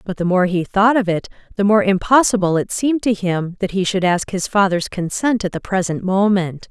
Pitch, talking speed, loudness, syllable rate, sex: 190 Hz, 225 wpm, -17 LUFS, 5.3 syllables/s, female